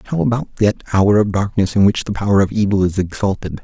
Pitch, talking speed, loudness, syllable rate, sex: 100 Hz, 230 wpm, -16 LUFS, 5.7 syllables/s, male